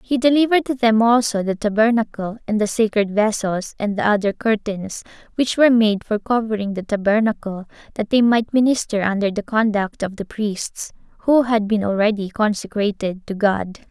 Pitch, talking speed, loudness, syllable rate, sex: 215 Hz, 170 wpm, -19 LUFS, 5.2 syllables/s, female